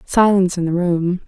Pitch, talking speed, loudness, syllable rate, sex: 180 Hz, 190 wpm, -17 LUFS, 5.2 syllables/s, female